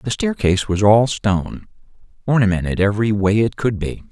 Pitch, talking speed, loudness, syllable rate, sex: 105 Hz, 160 wpm, -17 LUFS, 5.5 syllables/s, male